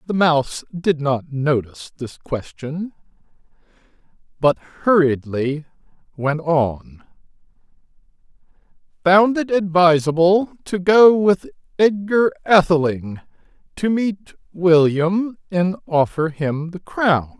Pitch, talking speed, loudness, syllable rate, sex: 170 Hz, 95 wpm, -18 LUFS, 3.5 syllables/s, male